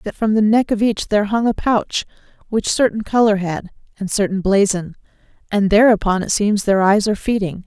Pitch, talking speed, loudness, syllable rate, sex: 205 Hz, 195 wpm, -17 LUFS, 5.4 syllables/s, female